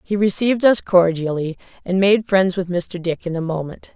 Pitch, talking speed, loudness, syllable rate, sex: 185 Hz, 195 wpm, -18 LUFS, 5.1 syllables/s, female